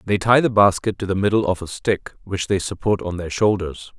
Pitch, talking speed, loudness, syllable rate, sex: 100 Hz, 240 wpm, -20 LUFS, 5.4 syllables/s, male